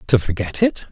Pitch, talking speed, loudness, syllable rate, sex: 120 Hz, 195 wpm, -20 LUFS, 5.3 syllables/s, male